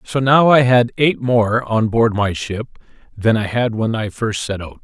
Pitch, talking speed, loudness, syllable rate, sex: 115 Hz, 225 wpm, -16 LUFS, 4.4 syllables/s, male